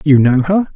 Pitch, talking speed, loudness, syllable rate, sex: 155 Hz, 240 wpm, -12 LUFS, 4.7 syllables/s, male